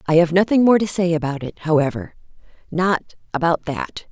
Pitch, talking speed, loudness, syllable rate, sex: 170 Hz, 160 wpm, -19 LUFS, 5.8 syllables/s, female